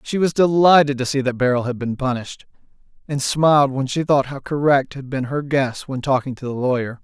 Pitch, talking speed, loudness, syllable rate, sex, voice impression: 135 Hz, 220 wpm, -19 LUFS, 5.6 syllables/s, male, masculine, adult-like, cool, slightly refreshing, sincere